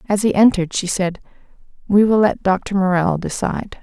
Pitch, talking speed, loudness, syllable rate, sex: 195 Hz, 175 wpm, -17 LUFS, 5.4 syllables/s, female